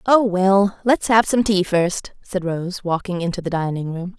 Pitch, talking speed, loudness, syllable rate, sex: 190 Hz, 200 wpm, -19 LUFS, 4.3 syllables/s, female